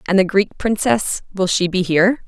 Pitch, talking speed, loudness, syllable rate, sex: 190 Hz, 185 wpm, -17 LUFS, 5.3 syllables/s, female